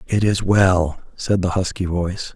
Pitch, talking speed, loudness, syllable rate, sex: 95 Hz, 180 wpm, -19 LUFS, 4.3 syllables/s, male